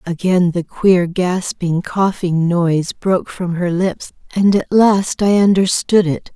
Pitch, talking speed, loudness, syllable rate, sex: 180 Hz, 150 wpm, -16 LUFS, 3.9 syllables/s, female